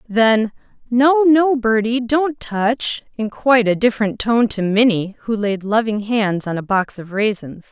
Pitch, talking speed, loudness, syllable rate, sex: 225 Hz, 170 wpm, -17 LUFS, 4.1 syllables/s, female